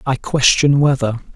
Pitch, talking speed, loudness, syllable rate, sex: 135 Hz, 135 wpm, -15 LUFS, 4.4 syllables/s, male